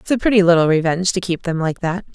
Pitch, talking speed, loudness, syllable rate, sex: 175 Hz, 280 wpm, -17 LUFS, 6.9 syllables/s, female